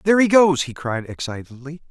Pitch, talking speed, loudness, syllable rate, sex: 155 Hz, 190 wpm, -19 LUFS, 5.8 syllables/s, male